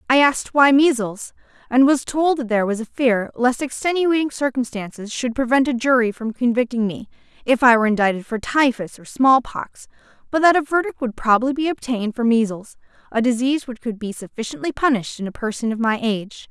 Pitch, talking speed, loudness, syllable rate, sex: 245 Hz, 195 wpm, -19 LUFS, 5.8 syllables/s, female